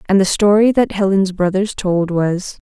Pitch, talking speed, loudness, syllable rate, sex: 195 Hz, 180 wpm, -15 LUFS, 4.5 syllables/s, female